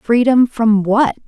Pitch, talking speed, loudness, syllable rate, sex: 230 Hz, 140 wpm, -14 LUFS, 3.5 syllables/s, female